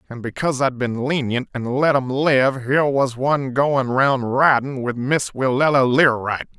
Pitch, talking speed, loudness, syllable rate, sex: 130 Hz, 175 wpm, -19 LUFS, 4.7 syllables/s, male